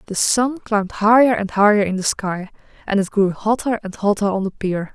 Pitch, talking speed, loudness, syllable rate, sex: 205 Hz, 220 wpm, -18 LUFS, 5.3 syllables/s, female